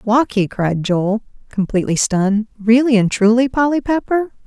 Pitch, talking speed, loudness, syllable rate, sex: 225 Hz, 135 wpm, -16 LUFS, 4.9 syllables/s, female